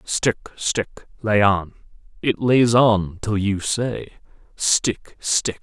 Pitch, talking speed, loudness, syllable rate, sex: 105 Hz, 130 wpm, -20 LUFS, 3.0 syllables/s, male